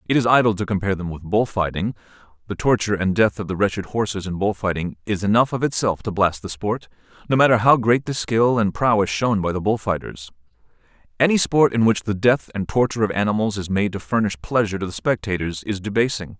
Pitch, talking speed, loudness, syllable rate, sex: 105 Hz, 225 wpm, -20 LUFS, 6.1 syllables/s, male